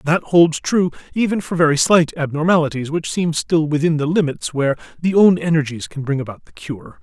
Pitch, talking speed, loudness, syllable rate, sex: 160 Hz, 195 wpm, -17 LUFS, 5.4 syllables/s, male